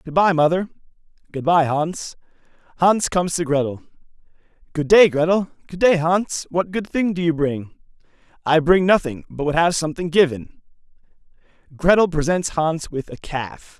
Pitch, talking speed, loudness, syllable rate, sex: 165 Hz, 150 wpm, -19 LUFS, 4.8 syllables/s, male